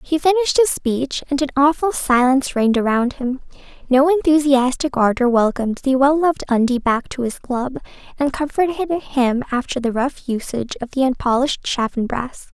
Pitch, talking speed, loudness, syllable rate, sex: 270 Hz, 160 wpm, -18 LUFS, 5.2 syllables/s, female